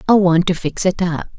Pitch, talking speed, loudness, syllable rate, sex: 175 Hz, 260 wpm, -17 LUFS, 5.2 syllables/s, female